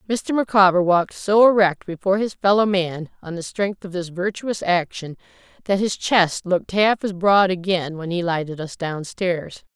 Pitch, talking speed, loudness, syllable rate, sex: 185 Hz, 180 wpm, -20 LUFS, 4.8 syllables/s, female